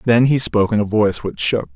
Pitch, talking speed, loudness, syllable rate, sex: 105 Hz, 275 wpm, -17 LUFS, 6.3 syllables/s, male